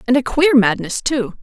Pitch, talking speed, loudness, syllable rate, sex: 245 Hz, 210 wpm, -16 LUFS, 4.7 syllables/s, female